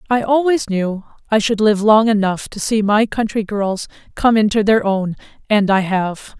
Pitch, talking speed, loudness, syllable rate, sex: 210 Hz, 190 wpm, -16 LUFS, 4.5 syllables/s, female